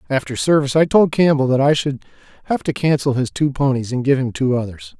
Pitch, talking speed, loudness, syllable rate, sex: 140 Hz, 230 wpm, -17 LUFS, 6.0 syllables/s, male